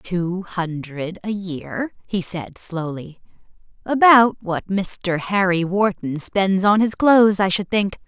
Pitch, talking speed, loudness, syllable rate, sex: 190 Hz, 140 wpm, -19 LUFS, 3.6 syllables/s, female